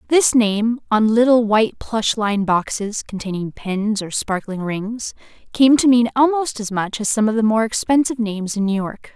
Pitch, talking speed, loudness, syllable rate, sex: 220 Hz, 190 wpm, -18 LUFS, 4.9 syllables/s, female